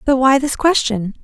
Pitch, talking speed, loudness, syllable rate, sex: 260 Hz, 195 wpm, -15 LUFS, 4.6 syllables/s, female